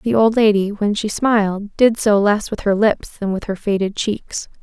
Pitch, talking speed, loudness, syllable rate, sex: 210 Hz, 220 wpm, -18 LUFS, 4.5 syllables/s, female